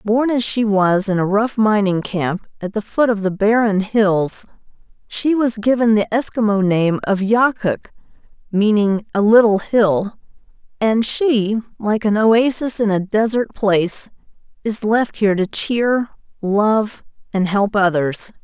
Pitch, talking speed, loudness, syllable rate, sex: 210 Hz, 150 wpm, -17 LUFS, 4.1 syllables/s, female